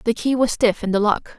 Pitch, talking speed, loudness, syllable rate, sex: 225 Hz, 305 wpm, -19 LUFS, 5.5 syllables/s, female